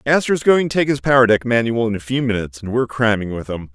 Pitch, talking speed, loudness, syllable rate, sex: 120 Hz, 275 wpm, -17 LUFS, 6.7 syllables/s, male